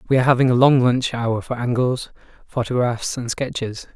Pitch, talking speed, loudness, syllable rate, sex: 125 Hz, 180 wpm, -20 LUFS, 5.3 syllables/s, male